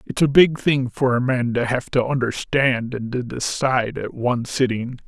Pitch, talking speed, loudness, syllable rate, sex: 125 Hz, 200 wpm, -20 LUFS, 4.7 syllables/s, male